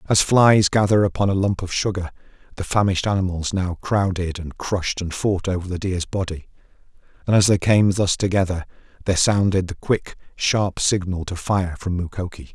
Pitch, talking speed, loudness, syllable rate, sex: 95 Hz, 175 wpm, -21 LUFS, 5.2 syllables/s, male